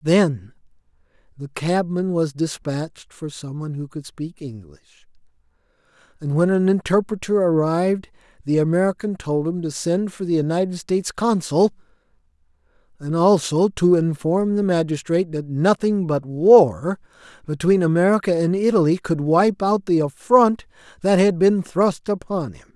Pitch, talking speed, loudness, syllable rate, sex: 170 Hz, 135 wpm, -20 LUFS, 4.7 syllables/s, male